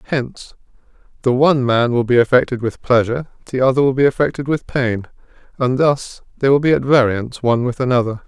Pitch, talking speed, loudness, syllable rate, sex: 130 Hz, 190 wpm, -17 LUFS, 6.2 syllables/s, male